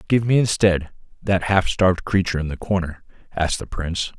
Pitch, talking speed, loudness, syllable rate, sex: 90 Hz, 185 wpm, -21 LUFS, 5.8 syllables/s, male